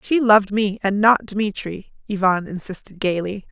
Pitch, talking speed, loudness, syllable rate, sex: 205 Hz, 155 wpm, -19 LUFS, 4.7 syllables/s, female